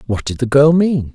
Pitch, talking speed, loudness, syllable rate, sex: 135 Hz, 260 wpm, -14 LUFS, 5.1 syllables/s, male